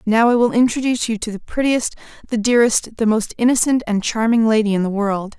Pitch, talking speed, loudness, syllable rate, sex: 225 Hz, 210 wpm, -17 LUFS, 6.0 syllables/s, female